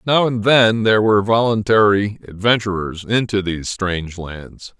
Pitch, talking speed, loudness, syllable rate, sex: 105 Hz, 140 wpm, -17 LUFS, 4.9 syllables/s, male